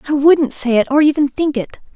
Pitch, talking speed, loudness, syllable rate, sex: 280 Hz, 245 wpm, -15 LUFS, 5.5 syllables/s, female